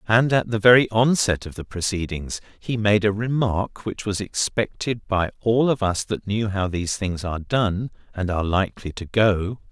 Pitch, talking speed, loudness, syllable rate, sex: 105 Hz, 190 wpm, -22 LUFS, 4.8 syllables/s, male